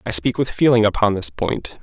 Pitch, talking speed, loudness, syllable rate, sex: 120 Hz, 230 wpm, -18 LUFS, 5.3 syllables/s, male